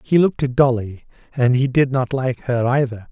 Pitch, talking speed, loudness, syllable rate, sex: 130 Hz, 210 wpm, -18 LUFS, 5.2 syllables/s, male